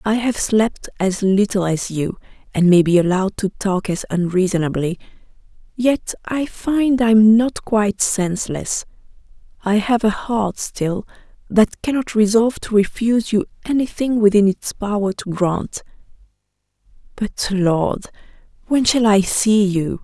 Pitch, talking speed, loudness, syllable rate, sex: 205 Hz, 140 wpm, -18 LUFS, 4.4 syllables/s, female